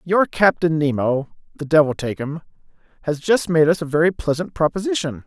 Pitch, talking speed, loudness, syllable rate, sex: 160 Hz, 150 wpm, -19 LUFS, 5.5 syllables/s, male